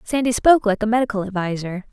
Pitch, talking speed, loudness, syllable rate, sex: 215 Hz, 190 wpm, -19 LUFS, 6.7 syllables/s, female